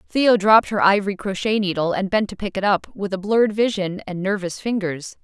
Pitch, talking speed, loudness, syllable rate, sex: 200 Hz, 220 wpm, -20 LUFS, 5.8 syllables/s, female